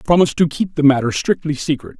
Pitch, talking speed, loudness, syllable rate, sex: 145 Hz, 210 wpm, -17 LUFS, 6.4 syllables/s, male